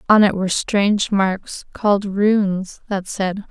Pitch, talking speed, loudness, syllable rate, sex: 200 Hz, 155 wpm, -19 LUFS, 4.2 syllables/s, female